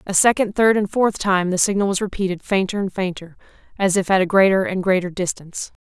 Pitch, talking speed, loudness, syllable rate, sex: 190 Hz, 215 wpm, -19 LUFS, 5.9 syllables/s, female